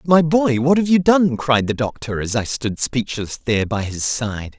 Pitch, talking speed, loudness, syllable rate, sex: 130 Hz, 220 wpm, -18 LUFS, 4.5 syllables/s, male